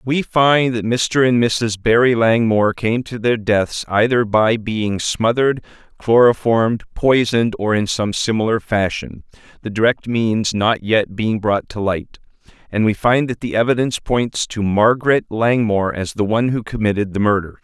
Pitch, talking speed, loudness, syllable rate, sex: 110 Hz, 165 wpm, -17 LUFS, 4.7 syllables/s, male